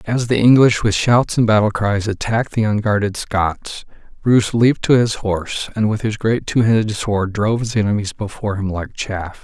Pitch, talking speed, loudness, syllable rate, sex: 110 Hz, 195 wpm, -17 LUFS, 5.2 syllables/s, male